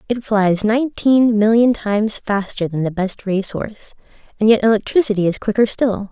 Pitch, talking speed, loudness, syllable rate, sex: 215 Hz, 165 wpm, -17 LUFS, 5.1 syllables/s, female